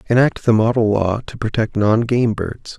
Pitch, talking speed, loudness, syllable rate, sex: 110 Hz, 195 wpm, -17 LUFS, 4.6 syllables/s, male